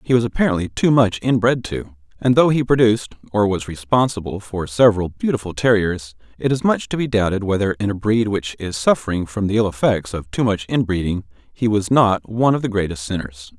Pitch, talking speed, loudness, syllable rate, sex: 105 Hz, 210 wpm, -19 LUFS, 5.7 syllables/s, male